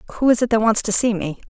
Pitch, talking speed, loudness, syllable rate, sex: 220 Hz, 320 wpm, -18 LUFS, 8.1 syllables/s, female